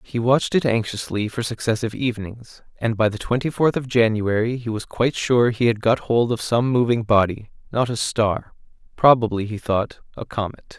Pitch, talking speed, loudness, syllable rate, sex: 115 Hz, 190 wpm, -21 LUFS, 5.2 syllables/s, male